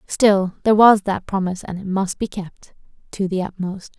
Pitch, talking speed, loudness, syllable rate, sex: 195 Hz, 180 wpm, -19 LUFS, 5.0 syllables/s, female